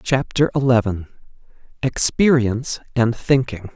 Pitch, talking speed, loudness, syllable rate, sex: 120 Hz, 80 wpm, -19 LUFS, 4.4 syllables/s, male